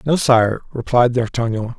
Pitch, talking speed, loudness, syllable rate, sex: 120 Hz, 135 wpm, -17 LUFS, 4.5 syllables/s, male